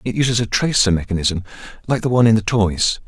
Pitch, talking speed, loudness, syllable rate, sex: 110 Hz, 215 wpm, -17 LUFS, 6.4 syllables/s, male